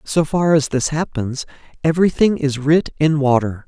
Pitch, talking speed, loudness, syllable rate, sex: 150 Hz, 165 wpm, -17 LUFS, 4.8 syllables/s, male